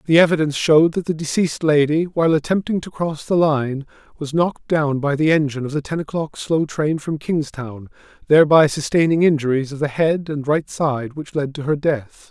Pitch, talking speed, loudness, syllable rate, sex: 150 Hz, 200 wpm, -19 LUFS, 5.4 syllables/s, male